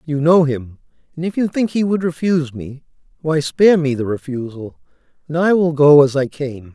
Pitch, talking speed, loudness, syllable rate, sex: 150 Hz, 205 wpm, -17 LUFS, 5.2 syllables/s, male